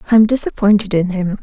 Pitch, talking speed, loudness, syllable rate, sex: 200 Hz, 210 wpm, -15 LUFS, 6.6 syllables/s, female